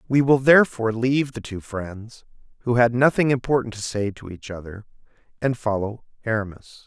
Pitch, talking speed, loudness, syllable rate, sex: 115 Hz, 165 wpm, -21 LUFS, 5.4 syllables/s, male